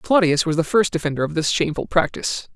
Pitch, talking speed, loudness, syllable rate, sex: 165 Hz, 210 wpm, -20 LUFS, 6.5 syllables/s, male